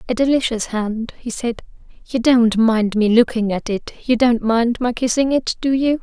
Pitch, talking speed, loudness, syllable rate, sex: 235 Hz, 190 wpm, -18 LUFS, 4.6 syllables/s, female